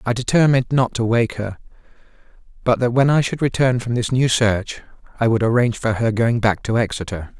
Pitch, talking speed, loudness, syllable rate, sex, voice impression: 120 Hz, 205 wpm, -19 LUFS, 5.7 syllables/s, male, very masculine, very adult-like, very old, very thick, tensed, powerful, slightly bright, very soft, very cool, intellectual, refreshing, very sincere, very calm, very mature, friendly, reassuring, very unique, slightly elegant, wild, very sweet, lively, kind, slightly modest